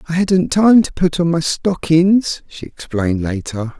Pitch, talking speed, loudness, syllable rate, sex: 160 Hz, 175 wpm, -16 LUFS, 4.4 syllables/s, male